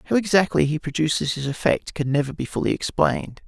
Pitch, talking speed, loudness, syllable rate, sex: 150 Hz, 190 wpm, -22 LUFS, 6.2 syllables/s, male